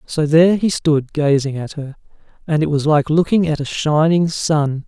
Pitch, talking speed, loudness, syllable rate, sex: 155 Hz, 195 wpm, -16 LUFS, 4.7 syllables/s, male